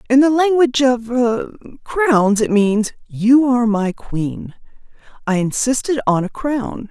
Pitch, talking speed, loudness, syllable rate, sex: 240 Hz, 130 wpm, -17 LUFS, 4.0 syllables/s, female